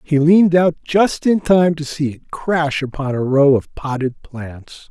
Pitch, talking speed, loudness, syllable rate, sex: 150 Hz, 195 wpm, -16 LUFS, 4.0 syllables/s, male